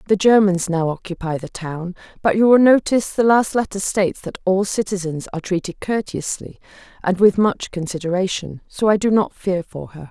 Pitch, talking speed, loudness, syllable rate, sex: 190 Hz, 185 wpm, -19 LUFS, 5.4 syllables/s, female